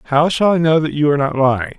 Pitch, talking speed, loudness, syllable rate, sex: 150 Hz, 300 wpm, -15 LUFS, 7.1 syllables/s, male